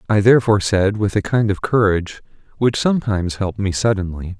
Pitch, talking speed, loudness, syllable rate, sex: 105 Hz, 190 wpm, -18 LUFS, 6.0 syllables/s, male